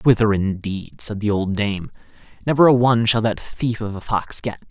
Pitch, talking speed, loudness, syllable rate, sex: 105 Hz, 205 wpm, -20 LUFS, 5.0 syllables/s, male